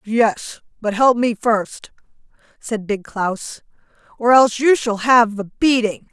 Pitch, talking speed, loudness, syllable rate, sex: 225 Hz, 145 wpm, -17 LUFS, 3.7 syllables/s, female